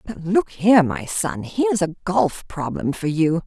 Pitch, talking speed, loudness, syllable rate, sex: 185 Hz, 190 wpm, -20 LUFS, 4.2 syllables/s, female